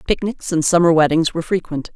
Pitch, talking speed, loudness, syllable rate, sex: 165 Hz, 185 wpm, -17 LUFS, 6.2 syllables/s, female